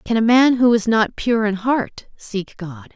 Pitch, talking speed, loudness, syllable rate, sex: 225 Hz, 225 wpm, -17 LUFS, 4.0 syllables/s, female